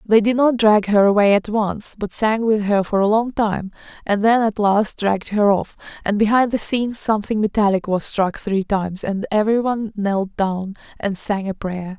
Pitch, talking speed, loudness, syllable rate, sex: 210 Hz, 205 wpm, -19 LUFS, 4.8 syllables/s, female